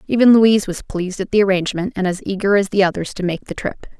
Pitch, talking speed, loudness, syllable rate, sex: 195 Hz, 255 wpm, -17 LUFS, 6.7 syllables/s, female